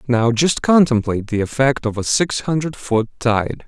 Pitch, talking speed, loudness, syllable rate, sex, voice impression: 125 Hz, 165 wpm, -18 LUFS, 4.7 syllables/s, male, masculine, adult-like, slightly thick, slightly fluent, slightly refreshing, sincere